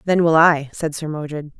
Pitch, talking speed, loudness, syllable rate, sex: 155 Hz, 225 wpm, -18 LUFS, 5.1 syllables/s, female